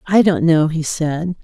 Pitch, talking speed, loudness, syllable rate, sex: 165 Hz, 210 wpm, -16 LUFS, 3.9 syllables/s, female